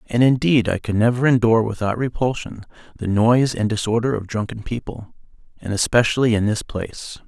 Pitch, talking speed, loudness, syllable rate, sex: 115 Hz, 165 wpm, -20 LUFS, 5.6 syllables/s, male